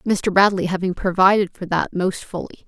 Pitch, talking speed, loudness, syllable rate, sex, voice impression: 185 Hz, 180 wpm, -19 LUFS, 5.3 syllables/s, female, feminine, adult-like, tensed, powerful, slightly dark, clear, fluent, intellectual, calm, reassuring, elegant, lively, kind